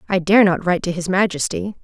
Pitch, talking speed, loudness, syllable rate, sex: 185 Hz, 230 wpm, -18 LUFS, 6.3 syllables/s, female